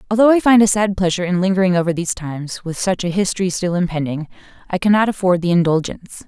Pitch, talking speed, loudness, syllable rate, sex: 185 Hz, 210 wpm, -17 LUFS, 6.9 syllables/s, female